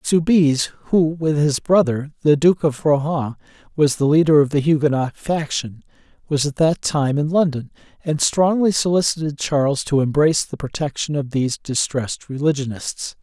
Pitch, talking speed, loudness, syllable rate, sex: 150 Hz, 155 wpm, -19 LUFS, 4.9 syllables/s, male